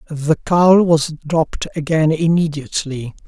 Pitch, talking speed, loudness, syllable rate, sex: 155 Hz, 110 wpm, -16 LUFS, 4.3 syllables/s, male